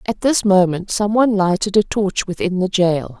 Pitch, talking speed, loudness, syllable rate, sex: 195 Hz, 205 wpm, -17 LUFS, 4.9 syllables/s, female